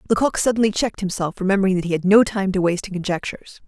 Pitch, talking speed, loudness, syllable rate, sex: 195 Hz, 230 wpm, -20 LUFS, 7.6 syllables/s, female